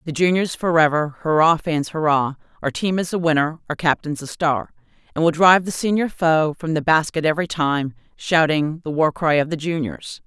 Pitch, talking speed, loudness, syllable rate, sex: 160 Hz, 195 wpm, -19 LUFS, 5.2 syllables/s, female